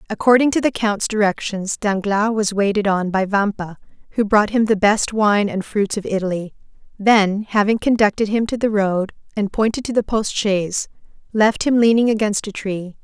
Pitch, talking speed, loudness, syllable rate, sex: 210 Hz, 185 wpm, -18 LUFS, 4.9 syllables/s, female